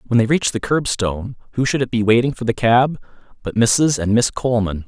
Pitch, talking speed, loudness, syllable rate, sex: 120 Hz, 210 wpm, -18 LUFS, 5.8 syllables/s, male